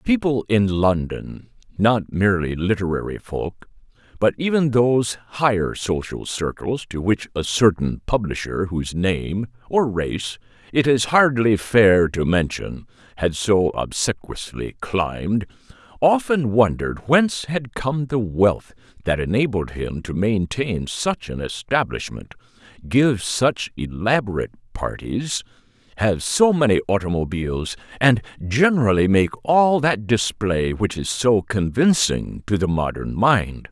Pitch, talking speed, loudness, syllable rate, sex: 110 Hz, 115 wpm, -20 LUFS, 4.1 syllables/s, male